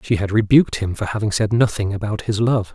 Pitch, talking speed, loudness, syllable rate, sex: 105 Hz, 240 wpm, -19 LUFS, 6.0 syllables/s, male